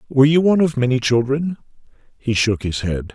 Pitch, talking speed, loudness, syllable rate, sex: 130 Hz, 190 wpm, -18 LUFS, 5.9 syllables/s, male